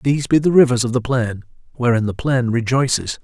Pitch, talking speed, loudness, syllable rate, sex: 125 Hz, 205 wpm, -17 LUFS, 5.7 syllables/s, male